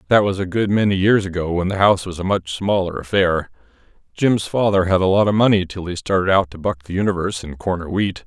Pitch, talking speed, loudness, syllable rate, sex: 95 Hz, 240 wpm, -19 LUFS, 6.0 syllables/s, male